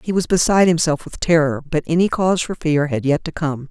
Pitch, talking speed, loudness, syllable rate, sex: 160 Hz, 245 wpm, -18 LUFS, 6.0 syllables/s, female